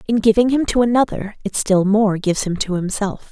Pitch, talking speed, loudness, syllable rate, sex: 210 Hz, 215 wpm, -18 LUFS, 5.5 syllables/s, female